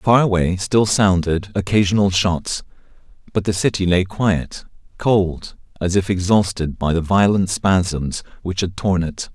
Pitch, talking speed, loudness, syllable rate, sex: 95 Hz, 150 wpm, -18 LUFS, 4.1 syllables/s, male